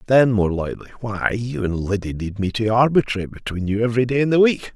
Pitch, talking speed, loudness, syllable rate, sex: 110 Hz, 225 wpm, -20 LUFS, 5.8 syllables/s, male